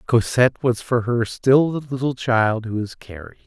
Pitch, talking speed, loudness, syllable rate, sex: 120 Hz, 190 wpm, -20 LUFS, 4.7 syllables/s, male